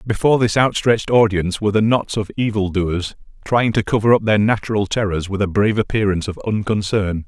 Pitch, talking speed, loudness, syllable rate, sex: 105 Hz, 190 wpm, -18 LUFS, 6.1 syllables/s, male